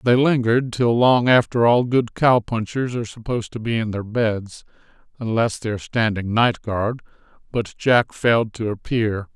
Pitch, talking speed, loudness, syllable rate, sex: 115 Hz, 155 wpm, -20 LUFS, 4.8 syllables/s, male